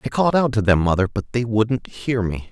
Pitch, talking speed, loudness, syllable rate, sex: 115 Hz, 265 wpm, -20 LUFS, 5.5 syllables/s, male